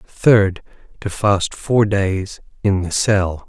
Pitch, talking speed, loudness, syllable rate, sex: 100 Hz, 120 wpm, -17 LUFS, 3.0 syllables/s, male